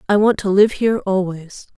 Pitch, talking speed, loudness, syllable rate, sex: 195 Hz, 200 wpm, -17 LUFS, 5.3 syllables/s, female